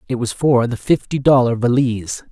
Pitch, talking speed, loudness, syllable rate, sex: 125 Hz, 180 wpm, -17 LUFS, 5.3 syllables/s, male